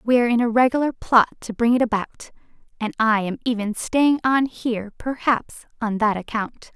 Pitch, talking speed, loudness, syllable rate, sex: 235 Hz, 185 wpm, -21 LUFS, 5.0 syllables/s, female